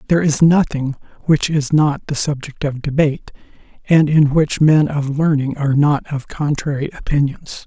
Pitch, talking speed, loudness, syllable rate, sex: 145 Hz, 165 wpm, -17 LUFS, 4.9 syllables/s, male